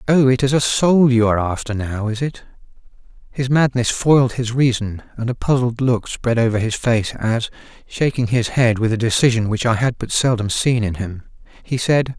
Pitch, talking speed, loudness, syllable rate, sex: 120 Hz, 200 wpm, -18 LUFS, 5.1 syllables/s, male